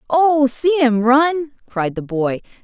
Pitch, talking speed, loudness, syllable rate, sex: 260 Hz, 160 wpm, -17 LUFS, 3.4 syllables/s, female